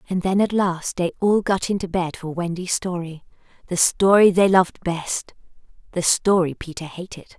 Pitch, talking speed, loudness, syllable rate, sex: 180 Hz, 170 wpm, -20 LUFS, 4.9 syllables/s, female